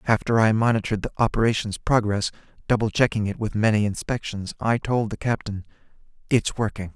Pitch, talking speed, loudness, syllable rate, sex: 110 Hz, 155 wpm, -23 LUFS, 5.8 syllables/s, male